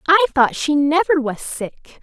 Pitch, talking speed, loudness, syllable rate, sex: 305 Hz, 180 wpm, -17 LUFS, 4.1 syllables/s, female